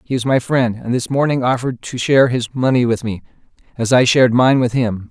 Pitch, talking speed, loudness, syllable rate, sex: 125 Hz, 225 wpm, -16 LUFS, 5.7 syllables/s, male